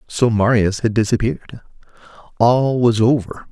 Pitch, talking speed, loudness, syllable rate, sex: 115 Hz, 120 wpm, -16 LUFS, 4.7 syllables/s, male